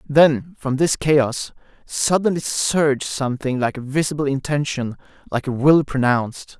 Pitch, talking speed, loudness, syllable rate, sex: 140 Hz, 135 wpm, -20 LUFS, 4.5 syllables/s, male